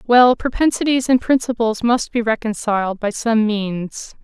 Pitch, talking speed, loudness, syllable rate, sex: 230 Hz, 140 wpm, -18 LUFS, 4.4 syllables/s, female